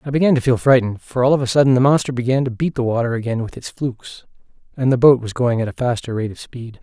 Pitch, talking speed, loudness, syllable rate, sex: 125 Hz, 280 wpm, -18 LUFS, 6.8 syllables/s, male